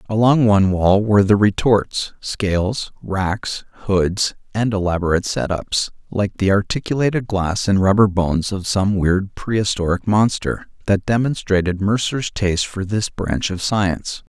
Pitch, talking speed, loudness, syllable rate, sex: 100 Hz, 140 wpm, -19 LUFS, 4.5 syllables/s, male